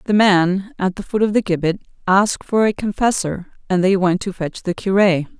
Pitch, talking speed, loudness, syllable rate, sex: 190 Hz, 210 wpm, -18 LUFS, 4.8 syllables/s, female